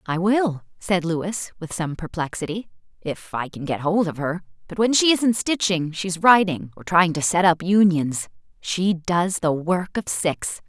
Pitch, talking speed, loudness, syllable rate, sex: 180 Hz, 185 wpm, -22 LUFS, 4.2 syllables/s, female